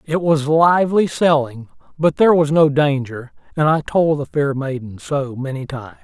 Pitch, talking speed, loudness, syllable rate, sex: 140 Hz, 180 wpm, -17 LUFS, 4.8 syllables/s, male